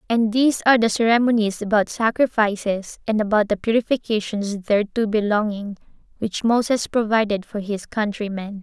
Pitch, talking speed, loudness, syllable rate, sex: 215 Hz, 130 wpm, -20 LUFS, 5.3 syllables/s, female